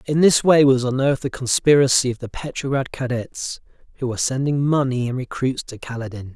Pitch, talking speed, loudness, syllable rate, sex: 130 Hz, 180 wpm, -20 LUFS, 5.7 syllables/s, male